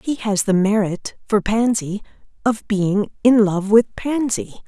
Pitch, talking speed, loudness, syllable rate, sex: 210 Hz, 130 wpm, -19 LUFS, 4.0 syllables/s, female